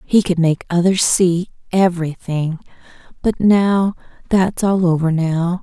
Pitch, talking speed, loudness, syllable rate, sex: 180 Hz, 105 wpm, -17 LUFS, 3.9 syllables/s, female